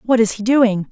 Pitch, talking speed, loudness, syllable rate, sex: 225 Hz, 265 wpm, -15 LUFS, 4.9 syllables/s, female